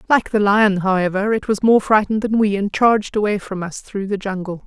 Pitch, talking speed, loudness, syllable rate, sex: 205 Hz, 230 wpm, -18 LUFS, 5.6 syllables/s, female